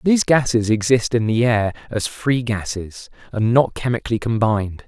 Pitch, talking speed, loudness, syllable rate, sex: 115 Hz, 160 wpm, -19 LUFS, 5.1 syllables/s, male